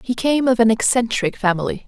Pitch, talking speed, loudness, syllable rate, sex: 230 Hz, 190 wpm, -18 LUFS, 5.7 syllables/s, female